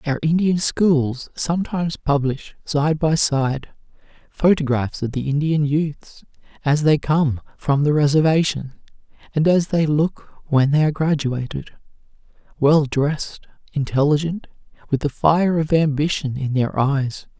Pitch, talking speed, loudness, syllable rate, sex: 150 Hz, 130 wpm, -20 LUFS, 4.3 syllables/s, male